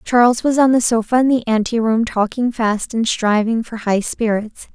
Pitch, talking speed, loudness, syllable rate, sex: 230 Hz, 200 wpm, -17 LUFS, 4.8 syllables/s, female